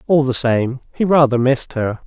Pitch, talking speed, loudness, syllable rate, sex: 135 Hz, 205 wpm, -17 LUFS, 5.3 syllables/s, male